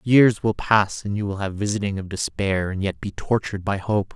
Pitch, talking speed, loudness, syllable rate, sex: 100 Hz, 230 wpm, -23 LUFS, 5.1 syllables/s, male